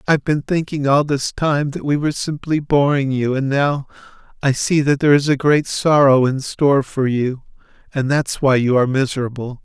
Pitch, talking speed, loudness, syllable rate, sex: 140 Hz, 200 wpm, -17 LUFS, 5.2 syllables/s, male